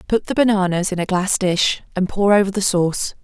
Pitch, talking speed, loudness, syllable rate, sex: 190 Hz, 225 wpm, -18 LUFS, 5.5 syllables/s, female